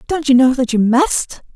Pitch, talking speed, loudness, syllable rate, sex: 265 Hz, 230 wpm, -14 LUFS, 4.6 syllables/s, female